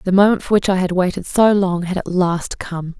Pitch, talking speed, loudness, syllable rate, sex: 185 Hz, 260 wpm, -17 LUFS, 5.2 syllables/s, female